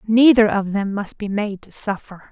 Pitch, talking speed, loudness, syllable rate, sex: 205 Hz, 205 wpm, -19 LUFS, 4.6 syllables/s, female